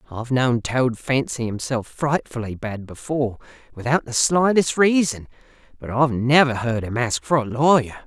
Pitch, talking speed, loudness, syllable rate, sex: 125 Hz, 155 wpm, -21 LUFS, 4.9 syllables/s, male